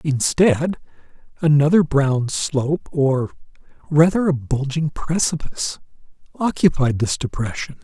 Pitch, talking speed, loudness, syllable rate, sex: 150 Hz, 90 wpm, -19 LUFS, 4.3 syllables/s, male